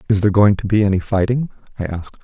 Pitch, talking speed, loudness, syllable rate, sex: 105 Hz, 240 wpm, -17 LUFS, 7.6 syllables/s, male